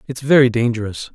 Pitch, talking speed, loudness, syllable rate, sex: 120 Hz, 155 wpm, -16 LUFS, 5.9 syllables/s, male